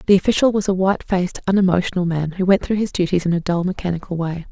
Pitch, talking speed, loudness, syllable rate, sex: 185 Hz, 240 wpm, -19 LUFS, 7.0 syllables/s, female